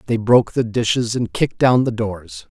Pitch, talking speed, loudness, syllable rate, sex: 110 Hz, 210 wpm, -18 LUFS, 5.2 syllables/s, male